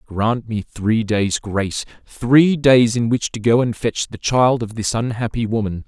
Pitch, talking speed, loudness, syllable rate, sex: 115 Hz, 195 wpm, -18 LUFS, 4.2 syllables/s, male